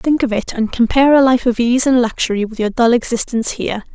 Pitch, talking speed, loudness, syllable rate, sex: 240 Hz, 245 wpm, -15 LUFS, 6.3 syllables/s, female